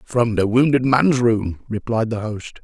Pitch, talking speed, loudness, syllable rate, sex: 115 Hz, 180 wpm, -19 LUFS, 4.2 syllables/s, male